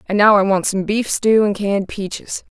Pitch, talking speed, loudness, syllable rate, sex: 200 Hz, 235 wpm, -17 LUFS, 5.2 syllables/s, female